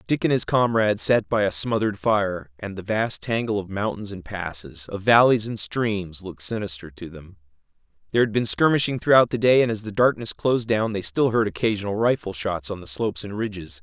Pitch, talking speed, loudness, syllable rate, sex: 105 Hz, 215 wpm, -22 LUFS, 5.6 syllables/s, male